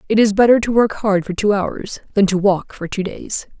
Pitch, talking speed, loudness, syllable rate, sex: 205 Hz, 250 wpm, -17 LUFS, 5.1 syllables/s, female